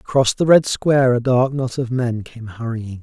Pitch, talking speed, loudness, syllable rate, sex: 125 Hz, 220 wpm, -18 LUFS, 4.7 syllables/s, male